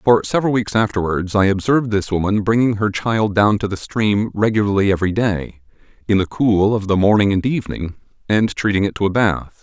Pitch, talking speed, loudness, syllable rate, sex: 105 Hz, 200 wpm, -17 LUFS, 5.6 syllables/s, male